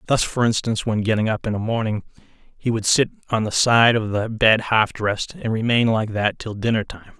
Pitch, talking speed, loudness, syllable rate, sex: 110 Hz, 225 wpm, -20 LUFS, 5.4 syllables/s, male